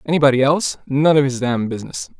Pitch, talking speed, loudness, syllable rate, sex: 135 Hz, 190 wpm, -17 LUFS, 6.9 syllables/s, male